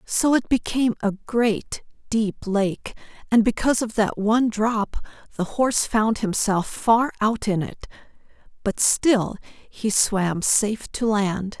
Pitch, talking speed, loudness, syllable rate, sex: 215 Hz, 145 wpm, -22 LUFS, 3.8 syllables/s, female